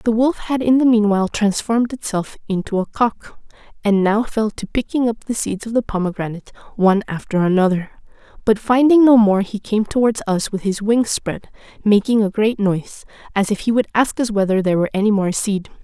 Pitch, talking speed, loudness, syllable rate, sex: 215 Hz, 200 wpm, -18 LUFS, 5.6 syllables/s, female